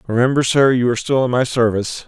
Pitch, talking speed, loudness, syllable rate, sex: 125 Hz, 230 wpm, -16 LUFS, 6.7 syllables/s, male